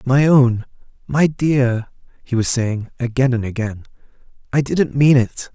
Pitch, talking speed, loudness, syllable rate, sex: 125 Hz, 150 wpm, -18 LUFS, 4.0 syllables/s, male